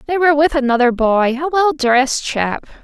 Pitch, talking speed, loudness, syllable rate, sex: 280 Hz, 170 wpm, -15 LUFS, 5.3 syllables/s, female